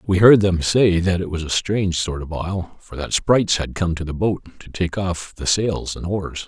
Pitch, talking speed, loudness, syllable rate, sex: 90 Hz, 250 wpm, -20 LUFS, 4.9 syllables/s, male